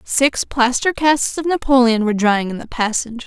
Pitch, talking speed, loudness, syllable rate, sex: 250 Hz, 185 wpm, -17 LUFS, 5.1 syllables/s, female